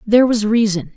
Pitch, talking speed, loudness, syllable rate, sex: 215 Hz, 190 wpm, -15 LUFS, 6.0 syllables/s, female